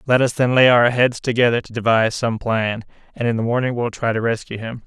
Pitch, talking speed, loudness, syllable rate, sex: 120 Hz, 245 wpm, -18 LUFS, 6.0 syllables/s, male